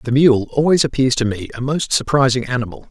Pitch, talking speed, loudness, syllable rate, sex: 130 Hz, 205 wpm, -17 LUFS, 6.0 syllables/s, male